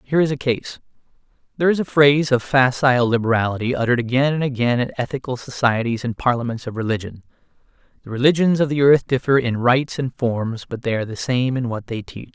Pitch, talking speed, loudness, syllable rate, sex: 125 Hz, 200 wpm, -19 LUFS, 6.4 syllables/s, male